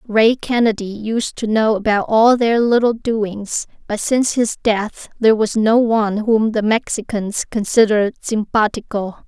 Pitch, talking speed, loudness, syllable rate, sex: 220 Hz, 150 wpm, -17 LUFS, 4.4 syllables/s, female